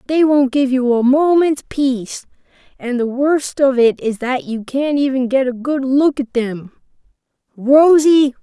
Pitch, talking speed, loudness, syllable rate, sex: 265 Hz, 170 wpm, -15 LUFS, 4.1 syllables/s, female